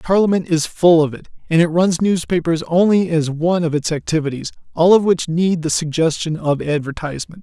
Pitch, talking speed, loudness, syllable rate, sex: 165 Hz, 180 wpm, -17 LUFS, 5.5 syllables/s, male